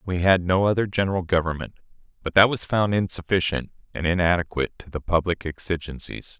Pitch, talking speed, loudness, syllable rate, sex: 90 Hz, 160 wpm, -23 LUFS, 5.9 syllables/s, male